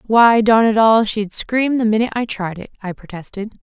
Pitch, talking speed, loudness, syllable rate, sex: 215 Hz, 215 wpm, -15 LUFS, 5.3 syllables/s, female